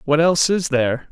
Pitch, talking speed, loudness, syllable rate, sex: 150 Hz, 215 wpm, -17 LUFS, 6.1 syllables/s, male